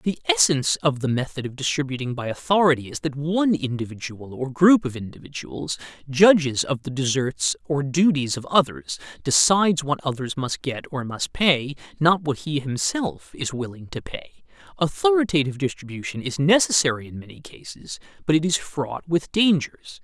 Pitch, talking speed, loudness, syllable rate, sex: 140 Hz, 160 wpm, -22 LUFS, 4.9 syllables/s, male